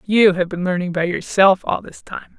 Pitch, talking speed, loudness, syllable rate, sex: 185 Hz, 225 wpm, -18 LUFS, 4.8 syllables/s, female